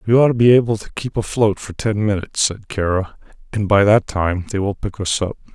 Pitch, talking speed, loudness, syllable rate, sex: 105 Hz, 240 wpm, -18 LUFS, 5.6 syllables/s, male